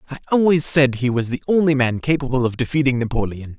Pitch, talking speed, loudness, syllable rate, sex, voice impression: 135 Hz, 200 wpm, -19 LUFS, 6.3 syllables/s, male, masculine, adult-like, clear, slightly fluent, refreshing, sincere, friendly